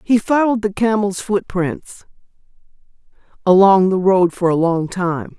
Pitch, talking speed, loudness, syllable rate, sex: 195 Hz, 135 wpm, -16 LUFS, 4.4 syllables/s, female